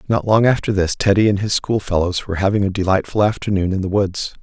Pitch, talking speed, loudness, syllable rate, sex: 100 Hz, 215 wpm, -18 LUFS, 6.2 syllables/s, male